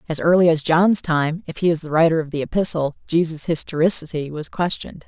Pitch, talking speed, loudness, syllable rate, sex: 165 Hz, 200 wpm, -19 LUFS, 5.9 syllables/s, female